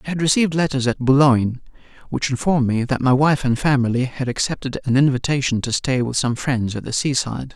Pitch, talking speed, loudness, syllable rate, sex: 130 Hz, 215 wpm, -19 LUFS, 6.0 syllables/s, male